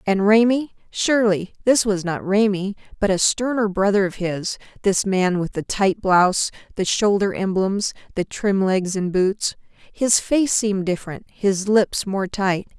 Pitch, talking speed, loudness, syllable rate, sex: 200 Hz, 160 wpm, -20 LUFS, 4.3 syllables/s, female